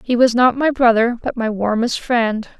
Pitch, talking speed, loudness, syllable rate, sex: 235 Hz, 210 wpm, -17 LUFS, 4.6 syllables/s, female